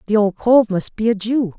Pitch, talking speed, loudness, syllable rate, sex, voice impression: 215 Hz, 265 wpm, -17 LUFS, 5.0 syllables/s, female, very feminine, adult-like, thin, tensed, slightly powerful, bright, slightly hard, clear, fluent, slightly raspy, cool, very intellectual, refreshing, sincere, calm, friendly, very reassuring, slightly unique, elegant, very wild, sweet, lively, strict, slightly intense